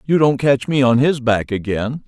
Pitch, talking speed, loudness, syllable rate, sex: 130 Hz, 230 wpm, -17 LUFS, 4.6 syllables/s, male